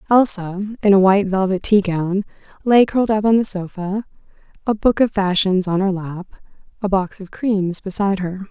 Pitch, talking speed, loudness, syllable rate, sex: 195 Hz, 175 wpm, -18 LUFS, 5.2 syllables/s, female